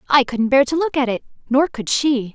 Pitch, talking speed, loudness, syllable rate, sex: 265 Hz, 230 wpm, -18 LUFS, 5.2 syllables/s, female